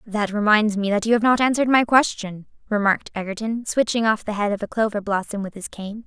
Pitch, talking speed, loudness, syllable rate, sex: 215 Hz, 230 wpm, -21 LUFS, 6.0 syllables/s, female